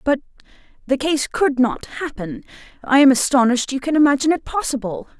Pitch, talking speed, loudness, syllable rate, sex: 275 Hz, 150 wpm, -18 LUFS, 5.9 syllables/s, female